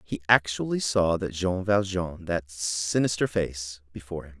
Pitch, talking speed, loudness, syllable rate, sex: 90 Hz, 150 wpm, -26 LUFS, 4.4 syllables/s, male